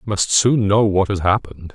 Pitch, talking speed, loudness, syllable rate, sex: 100 Hz, 240 wpm, -17 LUFS, 5.5 syllables/s, male